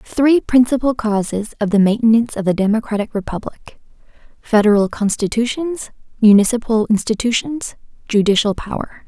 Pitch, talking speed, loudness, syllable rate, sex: 225 Hz, 85 wpm, -16 LUFS, 5.3 syllables/s, female